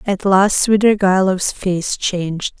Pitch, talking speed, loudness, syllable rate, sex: 190 Hz, 115 wpm, -16 LUFS, 3.7 syllables/s, female